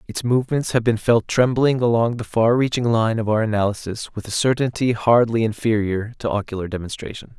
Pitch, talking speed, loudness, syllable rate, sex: 115 Hz, 180 wpm, -20 LUFS, 5.6 syllables/s, male